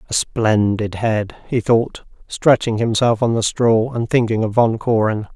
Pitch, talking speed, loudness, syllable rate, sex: 115 Hz, 170 wpm, -17 LUFS, 4.2 syllables/s, male